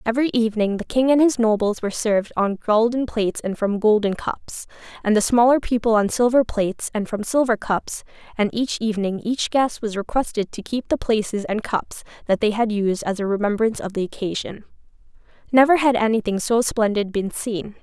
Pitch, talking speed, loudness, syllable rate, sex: 220 Hz, 190 wpm, -21 LUFS, 5.4 syllables/s, female